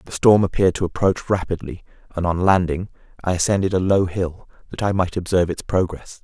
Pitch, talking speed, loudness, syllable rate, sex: 90 Hz, 195 wpm, -20 LUFS, 5.9 syllables/s, male